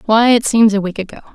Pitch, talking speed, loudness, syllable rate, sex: 215 Hz, 270 wpm, -13 LUFS, 6.7 syllables/s, female